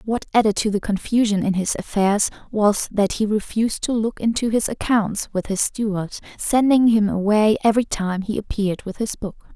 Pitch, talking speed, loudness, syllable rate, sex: 210 Hz, 190 wpm, -20 LUFS, 5.2 syllables/s, female